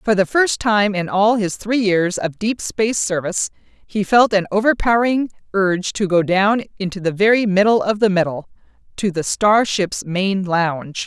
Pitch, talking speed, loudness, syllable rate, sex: 200 Hz, 180 wpm, -18 LUFS, 4.8 syllables/s, female